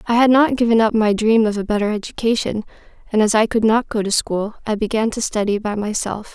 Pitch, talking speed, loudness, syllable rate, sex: 220 Hz, 235 wpm, -18 LUFS, 5.9 syllables/s, female